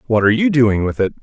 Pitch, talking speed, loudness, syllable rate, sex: 120 Hz, 295 wpm, -15 LUFS, 7.0 syllables/s, male